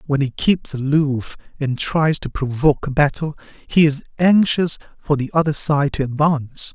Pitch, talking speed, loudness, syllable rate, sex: 145 Hz, 170 wpm, -19 LUFS, 4.7 syllables/s, male